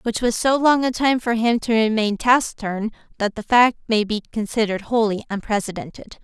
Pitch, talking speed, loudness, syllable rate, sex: 225 Hz, 185 wpm, -20 LUFS, 5.6 syllables/s, female